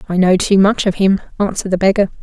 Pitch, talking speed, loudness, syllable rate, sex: 195 Hz, 240 wpm, -14 LUFS, 6.7 syllables/s, female